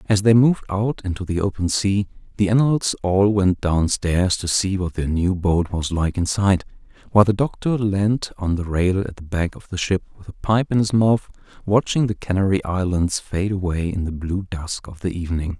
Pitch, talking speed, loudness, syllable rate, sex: 95 Hz, 210 wpm, -21 LUFS, 5.1 syllables/s, male